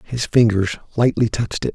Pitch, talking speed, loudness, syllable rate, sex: 110 Hz, 170 wpm, -19 LUFS, 5.8 syllables/s, male